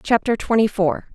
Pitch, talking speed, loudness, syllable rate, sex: 205 Hz, 160 wpm, -19 LUFS, 4.8 syllables/s, female